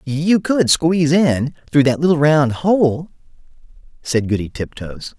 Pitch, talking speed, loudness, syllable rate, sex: 145 Hz, 140 wpm, -16 LUFS, 4.0 syllables/s, male